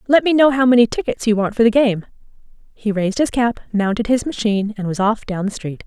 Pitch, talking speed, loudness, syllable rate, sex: 225 Hz, 245 wpm, -17 LUFS, 6.1 syllables/s, female